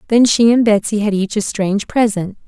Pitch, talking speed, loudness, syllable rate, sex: 210 Hz, 220 wpm, -15 LUFS, 5.5 syllables/s, female